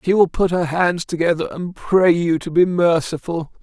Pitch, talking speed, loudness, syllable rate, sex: 170 Hz, 200 wpm, -18 LUFS, 4.7 syllables/s, male